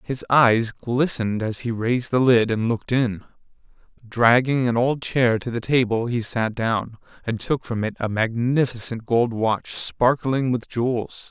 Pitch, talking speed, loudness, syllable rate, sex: 120 Hz, 170 wpm, -21 LUFS, 4.3 syllables/s, male